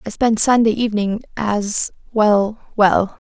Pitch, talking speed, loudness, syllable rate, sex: 215 Hz, 110 wpm, -17 LUFS, 3.9 syllables/s, female